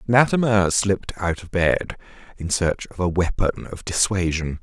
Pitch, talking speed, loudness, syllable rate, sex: 95 Hz, 155 wpm, -21 LUFS, 4.5 syllables/s, male